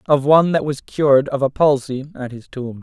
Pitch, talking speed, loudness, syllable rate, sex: 140 Hz, 235 wpm, -17 LUFS, 5.3 syllables/s, male